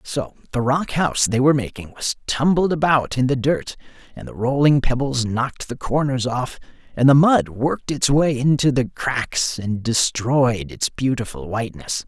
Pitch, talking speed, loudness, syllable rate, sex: 130 Hz, 175 wpm, -20 LUFS, 4.7 syllables/s, male